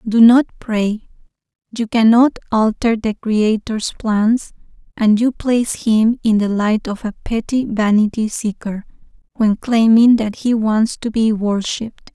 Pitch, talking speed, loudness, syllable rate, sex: 220 Hz, 145 wpm, -16 LUFS, 4.0 syllables/s, female